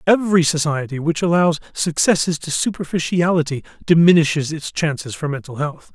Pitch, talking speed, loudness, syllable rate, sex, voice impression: 160 Hz, 130 wpm, -18 LUFS, 5.5 syllables/s, male, very masculine, very adult-like, slightly old, slightly thick, very tensed, powerful, bright, hard, very clear, fluent, slightly raspy, slightly cool, intellectual, refreshing, very sincere, slightly calm, slightly mature, slightly friendly, reassuring, unique, wild, very lively, intense, slightly sharp